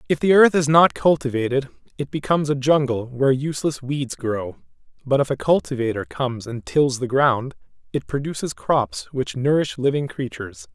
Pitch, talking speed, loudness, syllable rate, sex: 135 Hz, 165 wpm, -21 LUFS, 5.3 syllables/s, male